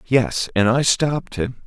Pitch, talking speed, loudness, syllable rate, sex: 120 Hz, 180 wpm, -19 LUFS, 4.0 syllables/s, male